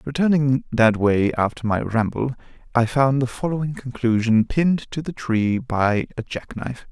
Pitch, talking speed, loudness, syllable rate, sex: 125 Hz, 155 wpm, -21 LUFS, 4.6 syllables/s, male